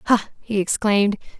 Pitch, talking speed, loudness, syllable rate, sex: 205 Hz, 130 wpm, -21 LUFS, 6.4 syllables/s, female